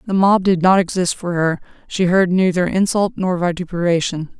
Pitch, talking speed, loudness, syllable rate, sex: 180 Hz, 175 wpm, -17 LUFS, 5.1 syllables/s, female